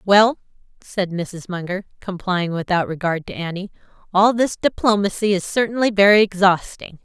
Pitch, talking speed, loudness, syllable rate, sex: 195 Hz, 135 wpm, -19 LUFS, 4.9 syllables/s, female